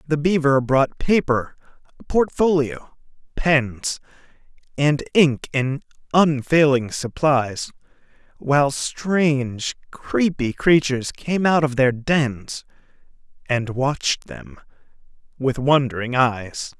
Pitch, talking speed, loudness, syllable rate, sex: 140 Hz, 95 wpm, -20 LUFS, 3.4 syllables/s, male